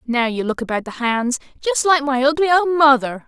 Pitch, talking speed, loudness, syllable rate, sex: 275 Hz, 220 wpm, -17 LUFS, 5.8 syllables/s, female